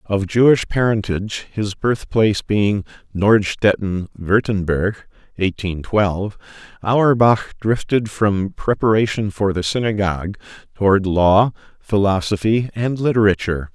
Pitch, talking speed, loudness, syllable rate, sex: 100 Hz, 95 wpm, -18 LUFS, 4.3 syllables/s, male